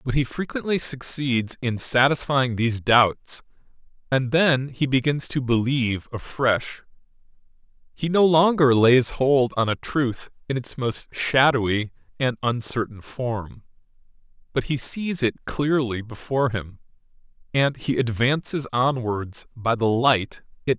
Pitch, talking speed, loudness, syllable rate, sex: 130 Hz, 135 wpm, -22 LUFS, 4.2 syllables/s, male